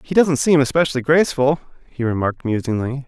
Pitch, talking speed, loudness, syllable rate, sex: 135 Hz, 155 wpm, -18 LUFS, 6.3 syllables/s, male